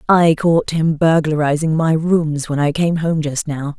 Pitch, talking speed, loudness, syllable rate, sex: 155 Hz, 190 wpm, -16 LUFS, 4.1 syllables/s, female